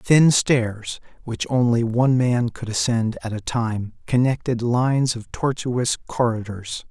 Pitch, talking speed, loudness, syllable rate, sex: 120 Hz, 140 wpm, -21 LUFS, 4.0 syllables/s, male